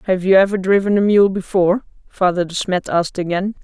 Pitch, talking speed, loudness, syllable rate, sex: 190 Hz, 200 wpm, -16 LUFS, 6.0 syllables/s, female